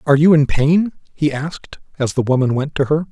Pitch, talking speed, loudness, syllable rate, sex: 145 Hz, 230 wpm, -17 LUFS, 5.8 syllables/s, male